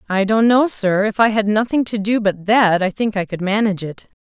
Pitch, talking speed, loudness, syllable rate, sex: 210 Hz, 255 wpm, -17 LUFS, 5.4 syllables/s, female